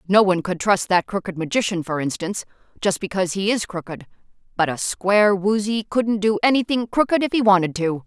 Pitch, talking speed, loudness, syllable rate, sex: 195 Hz, 195 wpm, -20 LUFS, 5.8 syllables/s, female